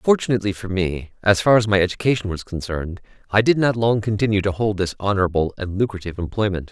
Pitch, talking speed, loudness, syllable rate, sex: 100 Hz, 195 wpm, -20 LUFS, 6.6 syllables/s, male